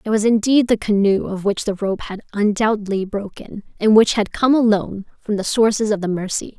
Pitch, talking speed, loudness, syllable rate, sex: 210 Hz, 210 wpm, -18 LUFS, 5.4 syllables/s, female